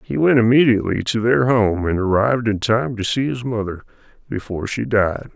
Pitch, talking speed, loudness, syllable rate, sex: 115 Hz, 190 wpm, -18 LUFS, 5.5 syllables/s, male